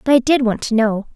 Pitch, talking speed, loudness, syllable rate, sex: 240 Hz, 310 wpm, -16 LUFS, 5.9 syllables/s, female